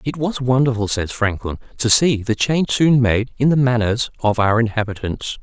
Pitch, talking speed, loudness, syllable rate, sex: 120 Hz, 190 wpm, -18 LUFS, 5.1 syllables/s, male